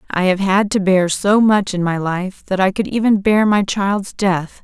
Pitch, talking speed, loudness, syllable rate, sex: 195 Hz, 235 wpm, -16 LUFS, 4.4 syllables/s, female